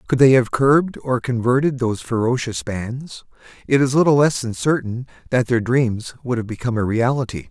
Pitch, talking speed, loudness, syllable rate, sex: 125 Hz, 185 wpm, -19 LUFS, 5.4 syllables/s, male